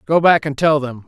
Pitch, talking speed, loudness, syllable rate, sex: 145 Hz, 280 wpm, -16 LUFS, 5.3 syllables/s, male